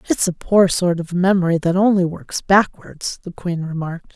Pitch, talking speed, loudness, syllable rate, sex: 180 Hz, 190 wpm, -18 LUFS, 4.8 syllables/s, female